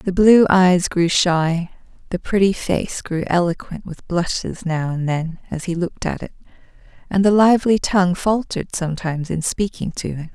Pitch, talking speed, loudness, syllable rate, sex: 180 Hz, 175 wpm, -19 LUFS, 4.9 syllables/s, female